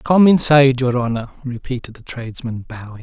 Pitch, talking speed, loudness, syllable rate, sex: 125 Hz, 160 wpm, -17 LUFS, 5.7 syllables/s, male